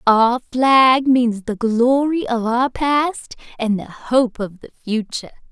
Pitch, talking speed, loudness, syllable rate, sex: 240 Hz, 150 wpm, -17 LUFS, 3.6 syllables/s, female